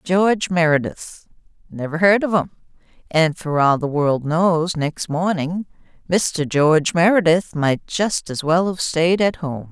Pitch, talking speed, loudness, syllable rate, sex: 165 Hz, 155 wpm, -18 LUFS, 4.1 syllables/s, female